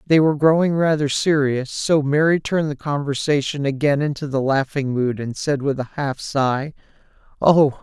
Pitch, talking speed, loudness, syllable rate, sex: 145 Hz, 170 wpm, -20 LUFS, 4.9 syllables/s, male